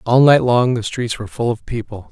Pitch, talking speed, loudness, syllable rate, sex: 120 Hz, 255 wpm, -17 LUFS, 5.6 syllables/s, male